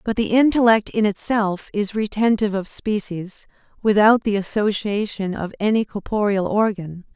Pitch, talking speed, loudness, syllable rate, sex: 205 Hz, 135 wpm, -20 LUFS, 4.8 syllables/s, female